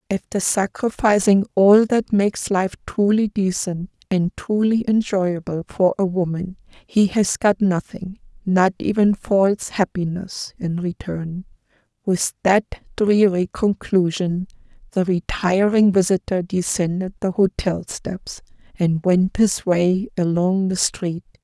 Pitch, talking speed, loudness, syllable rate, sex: 190 Hz, 120 wpm, -20 LUFS, 3.9 syllables/s, female